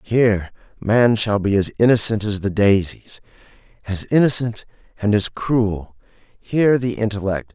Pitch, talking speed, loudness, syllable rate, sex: 105 Hz, 125 wpm, -18 LUFS, 4.5 syllables/s, male